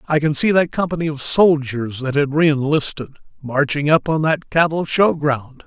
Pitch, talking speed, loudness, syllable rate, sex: 150 Hz, 190 wpm, -18 LUFS, 4.8 syllables/s, male